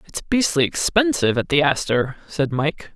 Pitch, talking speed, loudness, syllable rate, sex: 160 Hz, 165 wpm, -20 LUFS, 4.8 syllables/s, female